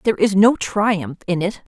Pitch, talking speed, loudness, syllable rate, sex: 195 Hz, 205 wpm, -18 LUFS, 4.8 syllables/s, female